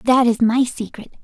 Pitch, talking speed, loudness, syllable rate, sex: 240 Hz, 195 wpm, -17 LUFS, 4.5 syllables/s, female